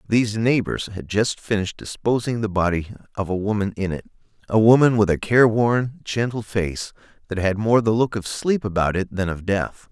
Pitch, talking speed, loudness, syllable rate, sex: 105 Hz, 190 wpm, -21 LUFS, 5.3 syllables/s, male